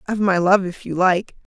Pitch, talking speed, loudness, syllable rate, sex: 185 Hz, 235 wpm, -19 LUFS, 4.8 syllables/s, female